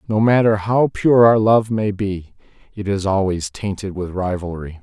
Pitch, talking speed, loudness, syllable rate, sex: 100 Hz, 175 wpm, -18 LUFS, 4.5 syllables/s, male